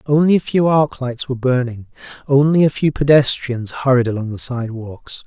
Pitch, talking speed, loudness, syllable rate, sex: 130 Hz, 180 wpm, -16 LUFS, 5.1 syllables/s, male